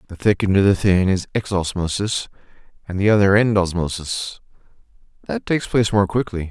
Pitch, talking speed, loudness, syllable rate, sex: 100 Hz, 165 wpm, -19 LUFS, 5.6 syllables/s, male